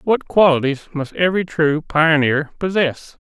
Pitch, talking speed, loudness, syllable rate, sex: 160 Hz, 130 wpm, -17 LUFS, 4.3 syllables/s, male